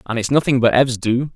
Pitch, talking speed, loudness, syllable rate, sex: 125 Hz, 265 wpm, -17 LUFS, 5.7 syllables/s, male